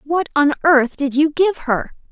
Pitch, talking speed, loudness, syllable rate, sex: 295 Hz, 200 wpm, -17 LUFS, 4.2 syllables/s, female